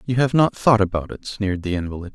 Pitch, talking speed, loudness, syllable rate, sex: 105 Hz, 250 wpm, -20 LUFS, 6.3 syllables/s, male